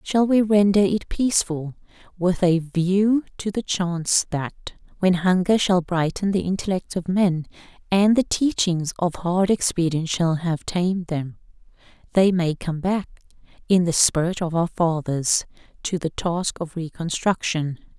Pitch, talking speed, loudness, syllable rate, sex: 180 Hz, 150 wpm, -22 LUFS, 4.4 syllables/s, female